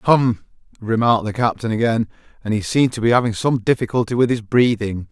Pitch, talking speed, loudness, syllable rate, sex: 115 Hz, 190 wpm, -18 LUFS, 6.0 syllables/s, male